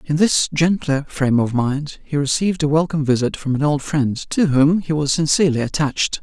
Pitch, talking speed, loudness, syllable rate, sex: 145 Hz, 205 wpm, -18 LUFS, 5.5 syllables/s, male